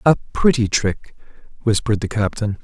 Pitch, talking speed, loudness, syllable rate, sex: 110 Hz, 135 wpm, -19 LUFS, 5.3 syllables/s, male